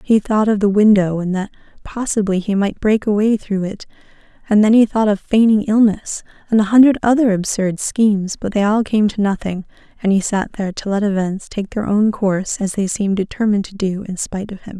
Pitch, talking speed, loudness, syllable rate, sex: 205 Hz, 220 wpm, -17 LUFS, 5.6 syllables/s, female